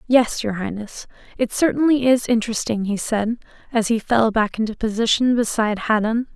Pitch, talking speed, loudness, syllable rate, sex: 225 Hz, 160 wpm, -20 LUFS, 5.3 syllables/s, female